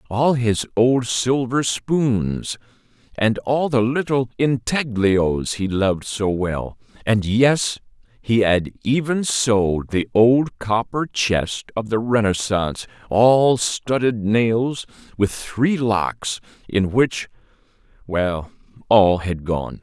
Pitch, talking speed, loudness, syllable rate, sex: 115 Hz, 120 wpm, -20 LUFS, 3.1 syllables/s, male